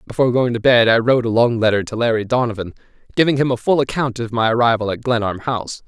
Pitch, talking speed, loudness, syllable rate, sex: 120 Hz, 235 wpm, -17 LUFS, 6.8 syllables/s, male